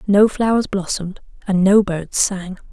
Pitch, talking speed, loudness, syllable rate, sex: 195 Hz, 155 wpm, -17 LUFS, 4.5 syllables/s, female